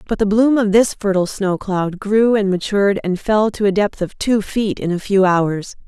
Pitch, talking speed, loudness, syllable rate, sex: 200 Hz, 235 wpm, -17 LUFS, 4.8 syllables/s, female